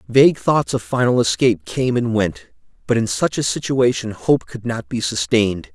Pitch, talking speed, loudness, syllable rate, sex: 120 Hz, 190 wpm, -18 LUFS, 4.9 syllables/s, male